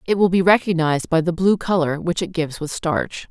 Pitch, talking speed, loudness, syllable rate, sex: 175 Hz, 235 wpm, -19 LUFS, 5.7 syllables/s, female